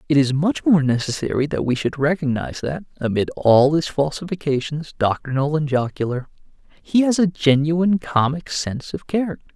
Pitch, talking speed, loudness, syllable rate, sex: 150 Hz, 155 wpm, -20 LUFS, 5.4 syllables/s, male